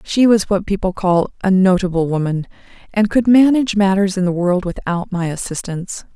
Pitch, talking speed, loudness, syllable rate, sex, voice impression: 190 Hz, 175 wpm, -16 LUFS, 5.3 syllables/s, female, very feminine, very gender-neutral, slightly young, slightly adult-like, very thin, slightly tensed, slightly powerful, slightly dark, slightly soft, clear, fluent, cute, very intellectual, refreshing, very sincere, very calm, friendly, reassuring, unique, elegant, slightly wild, sweet, lively, very kind